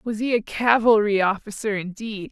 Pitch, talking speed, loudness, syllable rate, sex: 215 Hz, 155 wpm, -21 LUFS, 4.7 syllables/s, female